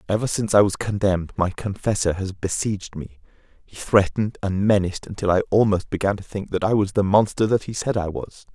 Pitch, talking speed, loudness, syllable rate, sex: 100 Hz, 210 wpm, -22 LUFS, 6.0 syllables/s, male